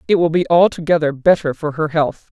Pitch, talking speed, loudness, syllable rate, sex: 160 Hz, 200 wpm, -16 LUFS, 5.5 syllables/s, female